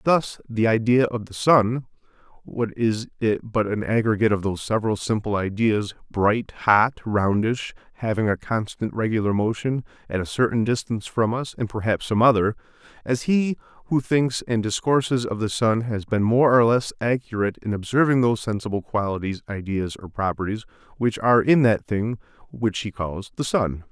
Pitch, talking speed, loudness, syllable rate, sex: 110 Hz, 170 wpm, -23 LUFS, 5.1 syllables/s, male